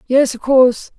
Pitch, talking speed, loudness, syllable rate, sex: 255 Hz, 180 wpm, -14 LUFS, 4.9 syllables/s, female